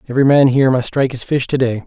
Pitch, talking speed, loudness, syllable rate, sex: 130 Hz, 290 wpm, -15 LUFS, 7.7 syllables/s, male